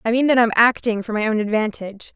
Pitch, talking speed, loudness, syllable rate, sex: 225 Hz, 250 wpm, -18 LUFS, 6.6 syllables/s, female